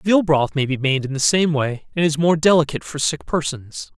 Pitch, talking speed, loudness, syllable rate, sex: 145 Hz, 240 wpm, -19 LUFS, 5.2 syllables/s, male